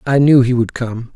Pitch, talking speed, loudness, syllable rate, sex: 125 Hz, 260 wpm, -14 LUFS, 4.9 syllables/s, male